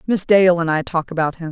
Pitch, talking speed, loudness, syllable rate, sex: 175 Hz, 280 wpm, -17 LUFS, 5.6 syllables/s, female